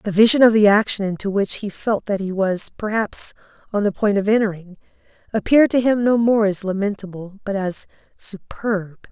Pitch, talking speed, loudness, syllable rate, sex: 205 Hz, 185 wpm, -19 LUFS, 5.2 syllables/s, female